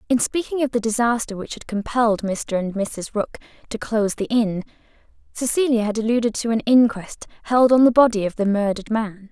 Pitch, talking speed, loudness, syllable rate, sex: 225 Hz, 195 wpm, -20 LUFS, 5.6 syllables/s, female